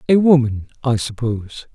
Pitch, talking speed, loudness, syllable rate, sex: 145 Hz, 140 wpm, -18 LUFS, 5.0 syllables/s, female